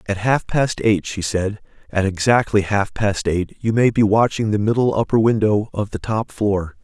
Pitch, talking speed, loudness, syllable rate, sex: 105 Hz, 200 wpm, -19 LUFS, 4.7 syllables/s, male